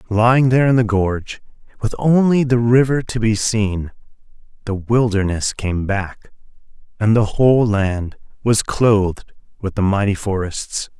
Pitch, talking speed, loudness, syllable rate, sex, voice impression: 110 Hz, 140 wpm, -17 LUFS, 4.4 syllables/s, male, very masculine, adult-like, slightly clear, cool, sincere, calm